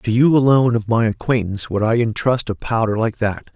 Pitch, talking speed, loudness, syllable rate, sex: 115 Hz, 220 wpm, -18 LUFS, 5.7 syllables/s, male